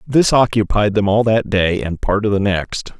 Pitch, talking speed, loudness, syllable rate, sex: 105 Hz, 220 wpm, -16 LUFS, 4.6 syllables/s, male